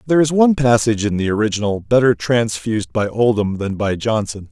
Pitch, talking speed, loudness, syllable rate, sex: 115 Hz, 185 wpm, -17 LUFS, 6.0 syllables/s, male